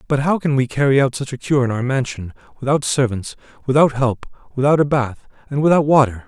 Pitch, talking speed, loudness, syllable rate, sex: 130 Hz, 210 wpm, -18 LUFS, 5.9 syllables/s, male